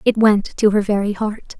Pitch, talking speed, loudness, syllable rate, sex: 210 Hz, 225 wpm, -17 LUFS, 4.7 syllables/s, female